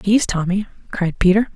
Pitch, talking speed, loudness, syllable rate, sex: 190 Hz, 155 wpm, -18 LUFS, 5.7 syllables/s, female